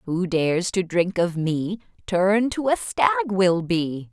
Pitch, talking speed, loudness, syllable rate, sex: 195 Hz, 175 wpm, -22 LUFS, 4.0 syllables/s, female